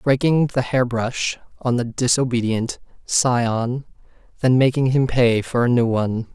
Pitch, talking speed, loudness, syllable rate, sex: 120 Hz, 150 wpm, -20 LUFS, 4.2 syllables/s, male